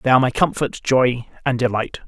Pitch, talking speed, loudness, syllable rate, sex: 125 Hz, 200 wpm, -19 LUFS, 5.6 syllables/s, male